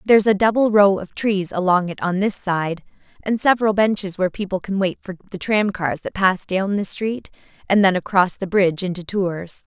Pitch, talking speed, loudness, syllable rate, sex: 195 Hz, 210 wpm, -19 LUFS, 5.3 syllables/s, female